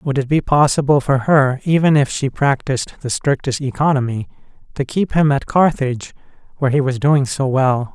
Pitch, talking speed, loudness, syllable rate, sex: 135 Hz, 180 wpm, -17 LUFS, 5.2 syllables/s, male